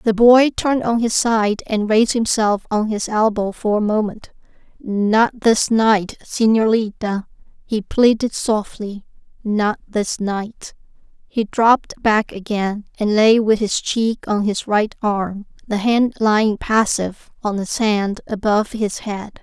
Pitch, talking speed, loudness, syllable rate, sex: 215 Hz, 150 wpm, -18 LUFS, 3.9 syllables/s, female